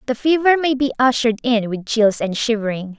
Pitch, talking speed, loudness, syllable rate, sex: 240 Hz, 200 wpm, -18 LUFS, 5.7 syllables/s, female